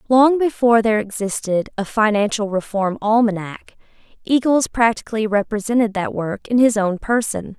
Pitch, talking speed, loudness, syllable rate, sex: 220 Hz, 135 wpm, -18 LUFS, 5.1 syllables/s, female